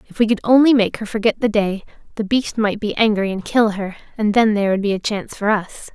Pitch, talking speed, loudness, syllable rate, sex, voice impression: 210 Hz, 260 wpm, -18 LUFS, 6.0 syllables/s, female, feminine, adult-like, tensed, slightly powerful, clear, fluent, intellectual, friendly, elegant, lively, slightly sharp